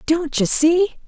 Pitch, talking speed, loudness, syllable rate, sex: 320 Hz, 165 wpm, -17 LUFS, 3.9 syllables/s, female